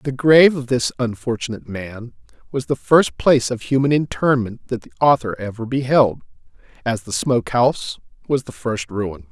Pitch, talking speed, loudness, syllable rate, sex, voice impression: 120 Hz, 165 wpm, -19 LUFS, 5.1 syllables/s, male, masculine, very adult-like, slightly thick, cool, slightly refreshing, sincere, slightly elegant